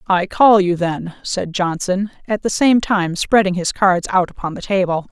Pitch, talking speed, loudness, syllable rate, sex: 190 Hz, 200 wpm, -17 LUFS, 4.5 syllables/s, female